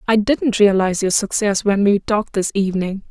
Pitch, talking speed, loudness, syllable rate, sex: 205 Hz, 195 wpm, -17 LUFS, 5.6 syllables/s, female